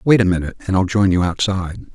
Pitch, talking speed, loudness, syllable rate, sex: 95 Hz, 245 wpm, -18 LUFS, 7.1 syllables/s, male